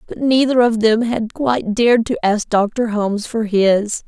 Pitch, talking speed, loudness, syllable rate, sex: 225 Hz, 190 wpm, -16 LUFS, 4.7 syllables/s, female